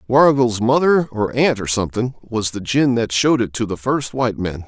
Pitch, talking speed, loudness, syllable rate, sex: 120 Hz, 220 wpm, -18 LUFS, 5.4 syllables/s, male